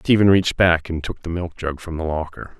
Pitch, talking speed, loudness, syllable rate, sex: 85 Hz, 230 wpm, -20 LUFS, 5.5 syllables/s, male